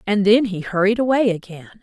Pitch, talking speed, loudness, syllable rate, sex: 205 Hz, 195 wpm, -18 LUFS, 5.6 syllables/s, female